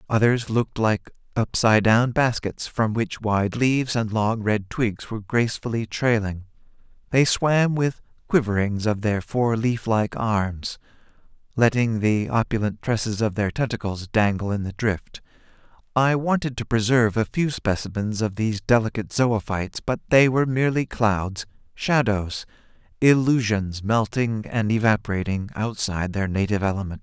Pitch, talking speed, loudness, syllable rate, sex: 110 Hz, 135 wpm, -23 LUFS, 4.8 syllables/s, male